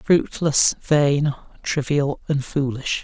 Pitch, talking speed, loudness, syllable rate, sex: 145 Hz, 100 wpm, -21 LUFS, 3.2 syllables/s, male